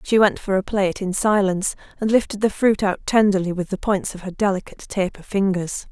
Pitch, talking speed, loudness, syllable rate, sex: 195 Hz, 215 wpm, -21 LUFS, 5.8 syllables/s, female